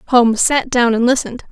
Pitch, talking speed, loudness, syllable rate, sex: 245 Hz, 200 wpm, -14 LUFS, 6.6 syllables/s, female